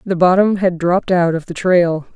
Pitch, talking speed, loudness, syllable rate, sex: 180 Hz, 220 wpm, -15 LUFS, 5.0 syllables/s, female